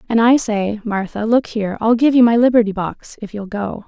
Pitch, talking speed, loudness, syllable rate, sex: 220 Hz, 230 wpm, -16 LUFS, 5.3 syllables/s, female